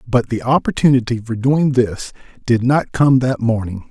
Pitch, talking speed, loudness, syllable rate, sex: 120 Hz, 170 wpm, -16 LUFS, 4.6 syllables/s, male